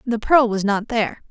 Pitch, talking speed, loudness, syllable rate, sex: 225 Hz, 230 wpm, -19 LUFS, 5.2 syllables/s, female